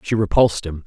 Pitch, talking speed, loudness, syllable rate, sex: 95 Hz, 205 wpm, -18 LUFS, 6.5 syllables/s, male